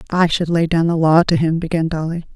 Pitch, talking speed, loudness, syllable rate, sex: 165 Hz, 255 wpm, -17 LUFS, 5.8 syllables/s, female